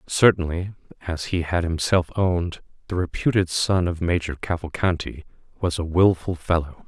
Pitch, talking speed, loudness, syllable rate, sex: 85 Hz, 140 wpm, -23 LUFS, 4.8 syllables/s, male